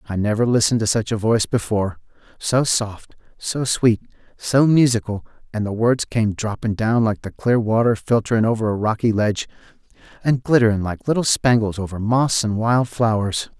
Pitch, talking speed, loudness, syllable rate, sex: 110 Hz, 170 wpm, -19 LUFS, 5.3 syllables/s, male